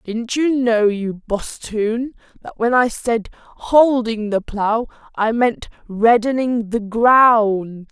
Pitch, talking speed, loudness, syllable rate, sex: 230 Hz, 130 wpm, -17 LUFS, 3.1 syllables/s, female